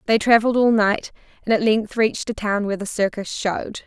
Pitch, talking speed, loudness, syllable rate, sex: 215 Hz, 215 wpm, -20 LUFS, 5.9 syllables/s, female